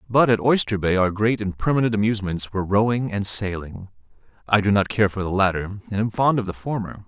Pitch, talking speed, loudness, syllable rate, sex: 105 Hz, 220 wpm, -21 LUFS, 6.0 syllables/s, male